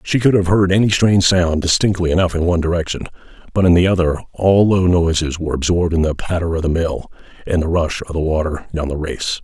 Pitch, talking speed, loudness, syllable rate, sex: 85 Hz, 225 wpm, -16 LUFS, 6.1 syllables/s, male